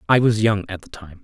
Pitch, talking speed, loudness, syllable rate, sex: 100 Hz, 290 wpm, -19 LUFS, 5.8 syllables/s, male